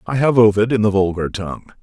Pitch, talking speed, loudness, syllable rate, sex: 105 Hz, 230 wpm, -16 LUFS, 6.6 syllables/s, male